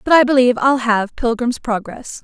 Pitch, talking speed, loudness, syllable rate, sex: 245 Hz, 190 wpm, -16 LUFS, 5.2 syllables/s, female